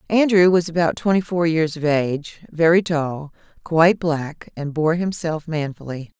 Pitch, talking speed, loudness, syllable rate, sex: 165 Hz, 155 wpm, -19 LUFS, 4.5 syllables/s, female